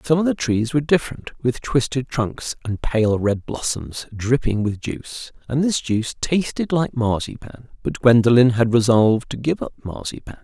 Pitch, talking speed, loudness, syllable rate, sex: 125 Hz, 170 wpm, -20 LUFS, 4.8 syllables/s, male